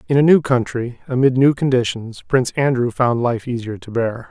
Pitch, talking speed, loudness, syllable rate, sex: 125 Hz, 195 wpm, -18 LUFS, 5.2 syllables/s, male